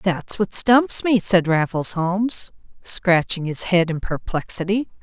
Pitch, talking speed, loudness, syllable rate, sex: 190 Hz, 145 wpm, -19 LUFS, 3.9 syllables/s, female